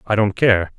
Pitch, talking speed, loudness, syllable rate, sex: 105 Hz, 230 wpm, -17 LUFS, 4.8 syllables/s, male